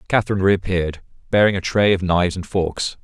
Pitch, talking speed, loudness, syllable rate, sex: 95 Hz, 180 wpm, -19 LUFS, 6.2 syllables/s, male